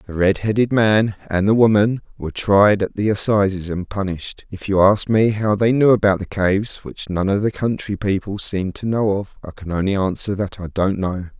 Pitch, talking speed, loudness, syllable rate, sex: 100 Hz, 215 wpm, -19 LUFS, 5.2 syllables/s, male